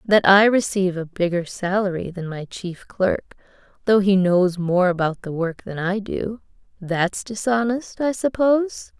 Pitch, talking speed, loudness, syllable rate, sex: 195 Hz, 155 wpm, -21 LUFS, 4.4 syllables/s, female